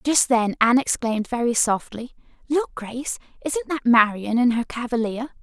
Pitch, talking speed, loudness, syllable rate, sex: 245 Hz, 155 wpm, -22 LUFS, 5.1 syllables/s, female